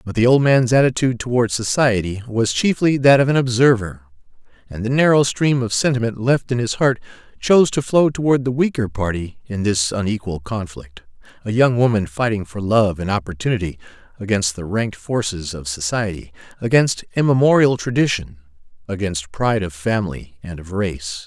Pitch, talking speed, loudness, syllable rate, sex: 110 Hz, 160 wpm, -18 LUFS, 5.3 syllables/s, male